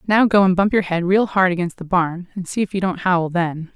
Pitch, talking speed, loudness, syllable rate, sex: 185 Hz, 290 wpm, -18 LUFS, 5.3 syllables/s, female